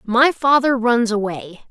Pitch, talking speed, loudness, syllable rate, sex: 240 Hz, 140 wpm, -17 LUFS, 3.9 syllables/s, female